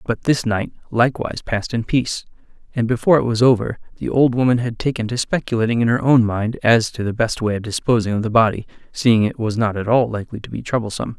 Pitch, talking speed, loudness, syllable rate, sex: 115 Hz, 230 wpm, -19 LUFS, 6.5 syllables/s, male